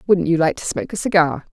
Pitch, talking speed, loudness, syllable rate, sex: 180 Hz, 270 wpm, -19 LUFS, 6.7 syllables/s, female